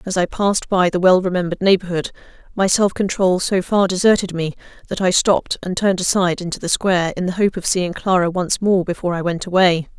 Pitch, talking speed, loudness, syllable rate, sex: 185 Hz, 215 wpm, -18 LUFS, 6.1 syllables/s, female